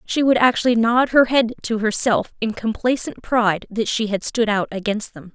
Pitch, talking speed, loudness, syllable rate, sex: 225 Hz, 200 wpm, -19 LUFS, 5.1 syllables/s, female